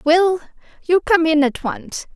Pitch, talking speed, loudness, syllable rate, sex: 325 Hz, 140 wpm, -18 LUFS, 4.1 syllables/s, female